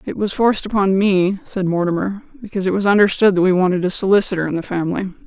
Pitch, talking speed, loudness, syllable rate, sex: 190 Hz, 215 wpm, -17 LUFS, 6.7 syllables/s, female